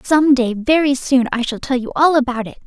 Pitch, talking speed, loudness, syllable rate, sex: 260 Hz, 250 wpm, -16 LUFS, 5.3 syllables/s, female